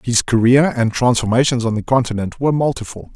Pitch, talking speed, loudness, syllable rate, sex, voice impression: 120 Hz, 170 wpm, -16 LUFS, 6.0 syllables/s, male, very masculine, very adult-like, old, very thick, tensed, very powerful, slightly bright, slightly soft, muffled, fluent, slightly raspy, very cool, intellectual, very sincere, very calm, very mature, friendly, reassuring, unique, slightly elegant, very wild, slightly sweet, lively, very kind, slightly intense